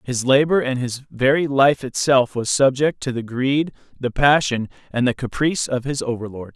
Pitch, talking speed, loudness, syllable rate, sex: 130 Hz, 190 wpm, -19 LUFS, 4.9 syllables/s, male